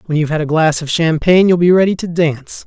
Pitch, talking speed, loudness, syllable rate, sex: 165 Hz, 270 wpm, -13 LUFS, 6.7 syllables/s, male